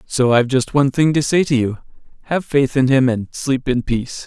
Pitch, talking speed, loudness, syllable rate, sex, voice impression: 130 Hz, 240 wpm, -17 LUFS, 5.6 syllables/s, male, very masculine, very adult-like, very middle-aged, very thick, slightly tensed, slightly powerful, slightly dark, hard, clear, fluent, slightly raspy, very cool, intellectual, refreshing, very sincere, calm, mature, very friendly, very reassuring, unique, elegant, slightly wild, sweet, slightly lively, kind, slightly modest